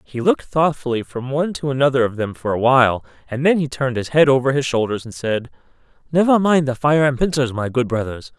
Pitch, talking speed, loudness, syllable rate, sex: 130 Hz, 230 wpm, -18 LUFS, 6.1 syllables/s, male